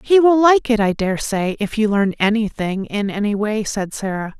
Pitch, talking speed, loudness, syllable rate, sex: 215 Hz, 220 wpm, -18 LUFS, 4.7 syllables/s, female